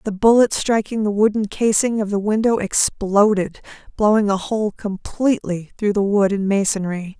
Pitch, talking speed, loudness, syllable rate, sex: 205 Hz, 160 wpm, -18 LUFS, 4.8 syllables/s, female